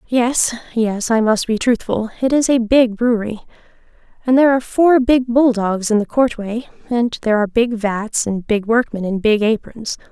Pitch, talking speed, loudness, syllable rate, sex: 230 Hz, 180 wpm, -17 LUFS, 5.0 syllables/s, female